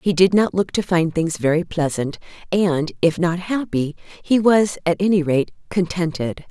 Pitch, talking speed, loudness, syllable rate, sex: 175 Hz, 175 wpm, -20 LUFS, 4.4 syllables/s, female